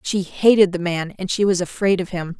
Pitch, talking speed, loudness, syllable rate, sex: 185 Hz, 250 wpm, -19 LUFS, 5.3 syllables/s, female